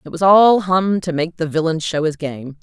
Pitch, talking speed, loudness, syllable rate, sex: 170 Hz, 250 wpm, -16 LUFS, 4.8 syllables/s, female